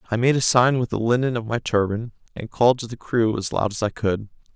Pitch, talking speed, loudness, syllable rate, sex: 115 Hz, 265 wpm, -21 LUFS, 6.0 syllables/s, male